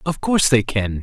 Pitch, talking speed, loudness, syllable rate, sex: 125 Hz, 235 wpm, -18 LUFS, 5.4 syllables/s, male